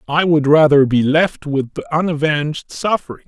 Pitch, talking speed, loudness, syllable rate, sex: 150 Hz, 165 wpm, -16 LUFS, 5.0 syllables/s, male